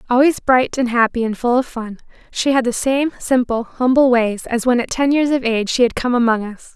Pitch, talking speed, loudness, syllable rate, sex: 245 Hz, 240 wpm, -17 LUFS, 5.4 syllables/s, female